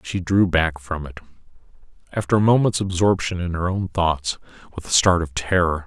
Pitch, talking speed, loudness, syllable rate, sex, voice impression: 90 Hz, 185 wpm, -20 LUFS, 5.1 syllables/s, male, masculine, middle-aged, slightly relaxed, powerful, bright, soft, slightly muffled, slightly raspy, slightly mature, friendly, reassuring, wild, lively, slightly kind